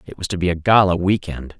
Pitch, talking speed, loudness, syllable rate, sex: 90 Hz, 265 wpm, -18 LUFS, 6.2 syllables/s, male